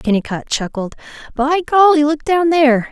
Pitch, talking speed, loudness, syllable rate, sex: 285 Hz, 145 wpm, -15 LUFS, 4.8 syllables/s, female